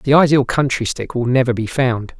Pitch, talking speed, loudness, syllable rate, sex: 130 Hz, 220 wpm, -17 LUFS, 5.1 syllables/s, male